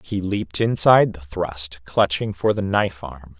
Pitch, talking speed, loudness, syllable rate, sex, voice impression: 90 Hz, 175 wpm, -20 LUFS, 4.6 syllables/s, male, masculine, middle-aged, tensed, powerful, clear, slightly halting, cool, mature, friendly, wild, lively, slightly strict